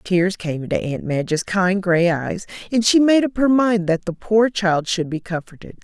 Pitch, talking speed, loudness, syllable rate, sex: 190 Hz, 215 wpm, -19 LUFS, 4.6 syllables/s, female